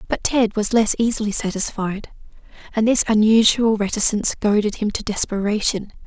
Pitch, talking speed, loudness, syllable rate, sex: 210 Hz, 140 wpm, -18 LUFS, 5.3 syllables/s, female